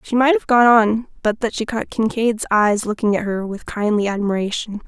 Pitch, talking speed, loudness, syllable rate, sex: 220 Hz, 210 wpm, -18 LUFS, 5.1 syllables/s, female